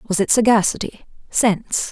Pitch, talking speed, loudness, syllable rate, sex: 210 Hz, 95 wpm, -18 LUFS, 4.8 syllables/s, female